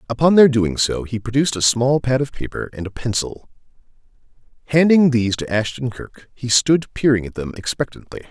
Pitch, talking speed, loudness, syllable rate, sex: 125 Hz, 180 wpm, -18 LUFS, 5.6 syllables/s, male